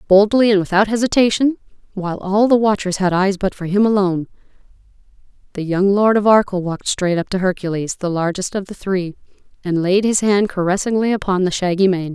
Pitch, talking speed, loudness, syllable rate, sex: 195 Hz, 190 wpm, -17 LUFS, 5.9 syllables/s, female